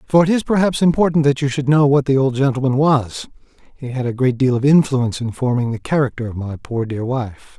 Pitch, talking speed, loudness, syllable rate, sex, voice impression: 130 Hz, 235 wpm, -17 LUFS, 5.9 syllables/s, male, masculine, adult-like, powerful, bright, fluent, raspy, sincere, calm, slightly mature, friendly, reassuring, wild, strict, slightly intense